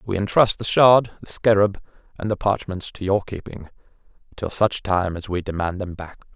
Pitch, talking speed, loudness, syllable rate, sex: 100 Hz, 200 wpm, -21 LUFS, 5.5 syllables/s, male